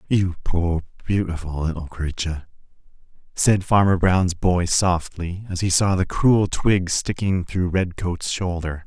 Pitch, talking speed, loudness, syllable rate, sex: 90 Hz, 135 wpm, -21 LUFS, 4.0 syllables/s, male